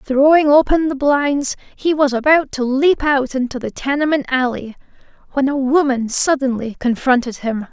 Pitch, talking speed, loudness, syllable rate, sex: 270 Hz, 155 wpm, -16 LUFS, 4.7 syllables/s, female